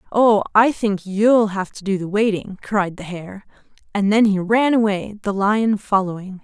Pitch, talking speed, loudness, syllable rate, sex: 205 Hz, 185 wpm, -18 LUFS, 4.4 syllables/s, female